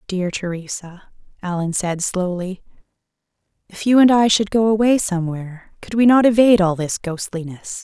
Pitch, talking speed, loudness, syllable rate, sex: 195 Hz, 155 wpm, -18 LUFS, 5.1 syllables/s, female